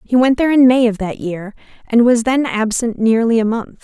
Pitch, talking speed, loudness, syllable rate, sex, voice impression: 230 Hz, 235 wpm, -15 LUFS, 5.2 syllables/s, female, very feminine, slightly adult-like, very thin, very tensed, powerful, very bright, slightly hard, very clear, fluent, cute, intellectual, very refreshing, sincere, calm, very friendly, reassuring, very unique, elegant, slightly wild, very sweet, very lively, kind, intense, slightly sharp, light